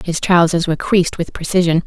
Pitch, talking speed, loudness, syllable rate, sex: 170 Hz, 195 wpm, -16 LUFS, 6.2 syllables/s, female